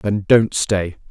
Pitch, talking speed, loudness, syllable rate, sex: 100 Hz, 165 wpm, -17 LUFS, 3.2 syllables/s, male